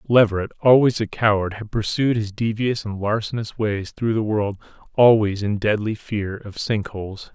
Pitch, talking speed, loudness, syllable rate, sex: 105 Hz, 170 wpm, -21 LUFS, 4.8 syllables/s, male